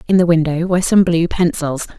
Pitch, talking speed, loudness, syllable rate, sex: 170 Hz, 210 wpm, -15 LUFS, 5.9 syllables/s, female